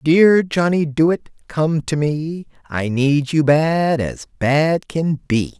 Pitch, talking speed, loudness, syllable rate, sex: 155 Hz, 150 wpm, -18 LUFS, 3.1 syllables/s, male